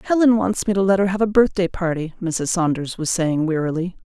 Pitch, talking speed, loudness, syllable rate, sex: 180 Hz, 220 wpm, -20 LUFS, 5.6 syllables/s, female